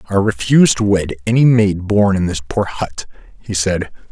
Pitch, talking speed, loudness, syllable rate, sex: 100 Hz, 190 wpm, -15 LUFS, 4.9 syllables/s, male